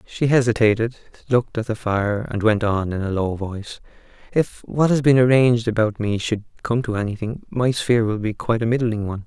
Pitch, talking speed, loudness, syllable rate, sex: 115 Hz, 205 wpm, -20 LUFS, 5.7 syllables/s, male